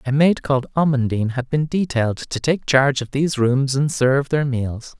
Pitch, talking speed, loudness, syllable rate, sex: 135 Hz, 205 wpm, -19 LUFS, 5.4 syllables/s, male